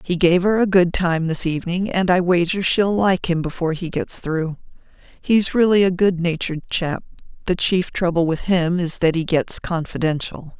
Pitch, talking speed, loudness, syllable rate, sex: 175 Hz, 185 wpm, -19 LUFS, 4.9 syllables/s, female